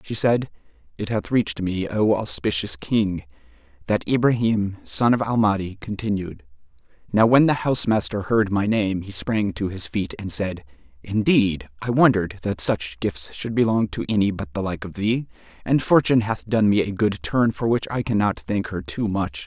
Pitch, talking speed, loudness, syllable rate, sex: 105 Hz, 190 wpm, -22 LUFS, 4.9 syllables/s, male